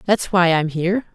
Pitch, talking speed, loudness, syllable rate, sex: 180 Hz, 210 wpm, -18 LUFS, 5.4 syllables/s, female